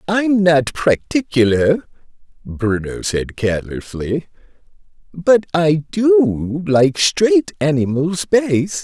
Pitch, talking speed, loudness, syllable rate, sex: 155 Hz, 90 wpm, -16 LUFS, 3.1 syllables/s, male